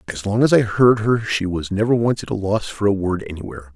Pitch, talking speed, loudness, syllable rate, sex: 105 Hz, 270 wpm, -19 LUFS, 5.9 syllables/s, male